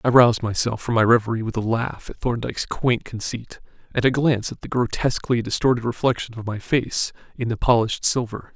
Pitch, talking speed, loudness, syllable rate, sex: 115 Hz, 195 wpm, -22 LUFS, 5.9 syllables/s, male